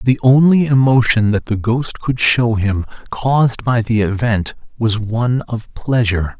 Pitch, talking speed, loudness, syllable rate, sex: 115 Hz, 160 wpm, -15 LUFS, 4.3 syllables/s, male